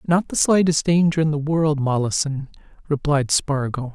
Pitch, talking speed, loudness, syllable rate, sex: 150 Hz, 150 wpm, -20 LUFS, 4.7 syllables/s, male